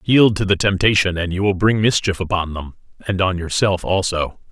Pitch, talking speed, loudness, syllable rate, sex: 95 Hz, 185 wpm, -18 LUFS, 5.2 syllables/s, male